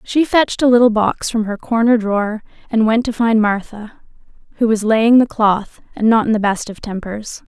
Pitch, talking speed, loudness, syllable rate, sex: 220 Hz, 205 wpm, -16 LUFS, 5.0 syllables/s, female